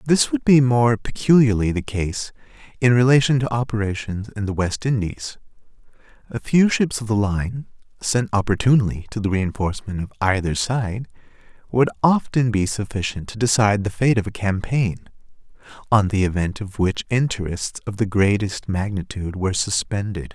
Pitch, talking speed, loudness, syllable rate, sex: 110 Hz, 155 wpm, -20 LUFS, 5.1 syllables/s, male